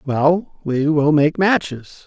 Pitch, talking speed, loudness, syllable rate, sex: 155 Hz, 145 wpm, -17 LUFS, 3.2 syllables/s, male